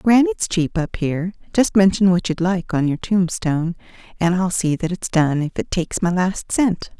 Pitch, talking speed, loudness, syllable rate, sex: 180 Hz, 205 wpm, -19 LUFS, 5.0 syllables/s, female